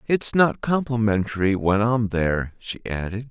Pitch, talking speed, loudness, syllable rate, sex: 110 Hz, 145 wpm, -22 LUFS, 4.6 syllables/s, male